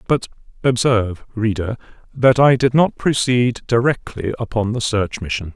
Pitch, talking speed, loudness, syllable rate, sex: 115 Hz, 140 wpm, -18 LUFS, 4.7 syllables/s, male